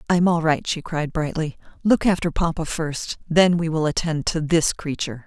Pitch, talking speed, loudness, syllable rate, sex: 160 Hz, 205 wpm, -22 LUFS, 5.1 syllables/s, female